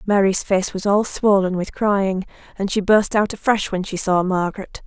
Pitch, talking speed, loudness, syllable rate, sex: 195 Hz, 195 wpm, -19 LUFS, 4.7 syllables/s, female